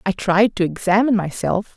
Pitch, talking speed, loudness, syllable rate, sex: 195 Hz, 170 wpm, -18 LUFS, 5.5 syllables/s, female